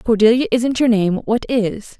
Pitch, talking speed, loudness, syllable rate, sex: 230 Hz, 210 wpm, -17 LUFS, 4.8 syllables/s, female